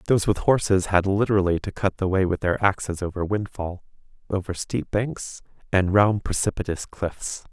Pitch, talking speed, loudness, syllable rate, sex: 95 Hz, 170 wpm, -24 LUFS, 5.1 syllables/s, male